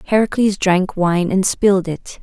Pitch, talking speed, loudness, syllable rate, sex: 190 Hz, 160 wpm, -16 LUFS, 4.5 syllables/s, female